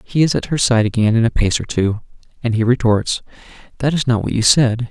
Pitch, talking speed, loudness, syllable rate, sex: 115 Hz, 245 wpm, -17 LUFS, 5.7 syllables/s, male